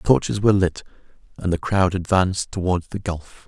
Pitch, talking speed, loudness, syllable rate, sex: 90 Hz, 190 wpm, -21 LUFS, 5.6 syllables/s, male